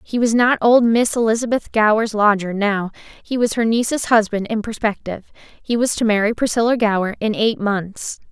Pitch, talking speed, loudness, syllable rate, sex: 220 Hz, 175 wpm, -18 LUFS, 5.0 syllables/s, female